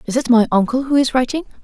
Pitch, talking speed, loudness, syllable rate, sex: 250 Hz, 255 wpm, -16 LUFS, 6.8 syllables/s, female